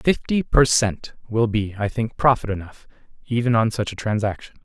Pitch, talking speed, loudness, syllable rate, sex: 115 Hz, 180 wpm, -21 LUFS, 5.1 syllables/s, male